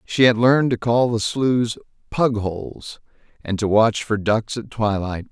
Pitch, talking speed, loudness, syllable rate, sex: 115 Hz, 170 wpm, -20 LUFS, 4.3 syllables/s, male